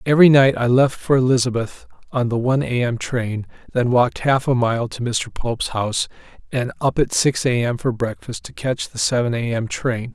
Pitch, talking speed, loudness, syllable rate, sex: 125 Hz, 215 wpm, -19 LUFS, 5.2 syllables/s, male